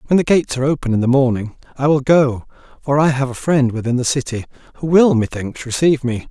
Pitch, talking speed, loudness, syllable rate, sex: 135 Hz, 230 wpm, -16 LUFS, 6.3 syllables/s, male